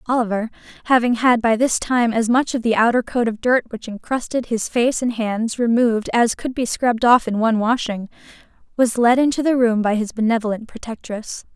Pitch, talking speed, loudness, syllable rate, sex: 235 Hz, 195 wpm, -19 LUFS, 5.4 syllables/s, female